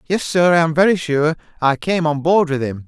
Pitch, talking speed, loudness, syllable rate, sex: 160 Hz, 250 wpm, -17 LUFS, 5.3 syllables/s, male